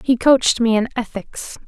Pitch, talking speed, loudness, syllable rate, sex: 240 Hz, 180 wpm, -17 LUFS, 4.9 syllables/s, female